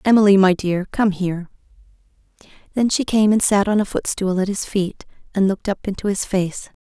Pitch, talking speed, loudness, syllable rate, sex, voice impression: 195 Hz, 195 wpm, -19 LUFS, 5.6 syllables/s, female, very feminine, middle-aged, thin, relaxed, weak, slightly dark, soft, slightly clear, fluent, cute, slightly cool, intellectual, slightly refreshing, sincere, slightly calm, slightly friendly, reassuring, elegant, slightly sweet, kind, very modest